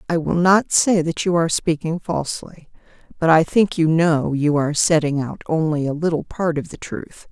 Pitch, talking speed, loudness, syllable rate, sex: 160 Hz, 205 wpm, -19 LUFS, 5.0 syllables/s, female